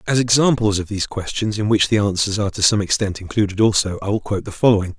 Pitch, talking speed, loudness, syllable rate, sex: 105 Hz, 240 wpm, -18 LUFS, 6.9 syllables/s, male